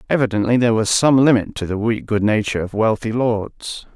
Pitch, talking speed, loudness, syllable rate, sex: 110 Hz, 195 wpm, -18 LUFS, 5.7 syllables/s, male